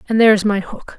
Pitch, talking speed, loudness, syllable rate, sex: 210 Hz, 305 wpm, -15 LUFS, 7.4 syllables/s, female